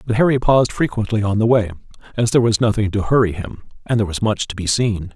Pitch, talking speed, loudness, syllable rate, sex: 110 Hz, 245 wpm, -18 LUFS, 6.8 syllables/s, male